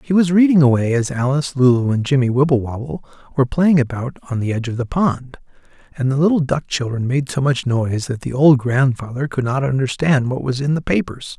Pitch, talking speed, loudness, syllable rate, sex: 135 Hz, 210 wpm, -17 LUFS, 5.8 syllables/s, male